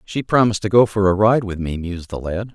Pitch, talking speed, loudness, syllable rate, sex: 100 Hz, 285 wpm, -18 LUFS, 6.2 syllables/s, male